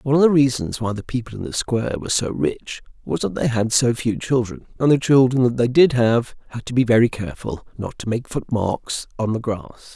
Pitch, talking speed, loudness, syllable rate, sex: 120 Hz, 240 wpm, -20 LUFS, 5.9 syllables/s, male